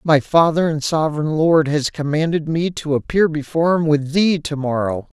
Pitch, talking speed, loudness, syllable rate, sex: 155 Hz, 185 wpm, -18 LUFS, 5.0 syllables/s, male